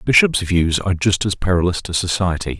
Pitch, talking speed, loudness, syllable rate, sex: 95 Hz, 210 wpm, -18 LUFS, 6.1 syllables/s, male